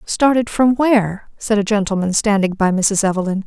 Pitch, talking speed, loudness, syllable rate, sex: 210 Hz, 175 wpm, -16 LUFS, 5.2 syllables/s, female